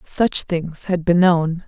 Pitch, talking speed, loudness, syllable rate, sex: 175 Hz, 180 wpm, -18 LUFS, 3.2 syllables/s, female